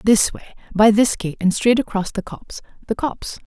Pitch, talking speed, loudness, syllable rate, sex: 215 Hz, 205 wpm, -19 LUFS, 5.7 syllables/s, female